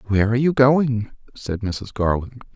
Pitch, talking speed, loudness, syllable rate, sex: 115 Hz, 165 wpm, -20 LUFS, 5.0 syllables/s, male